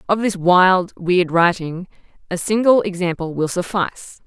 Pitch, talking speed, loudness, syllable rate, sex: 180 Hz, 140 wpm, -18 LUFS, 4.4 syllables/s, female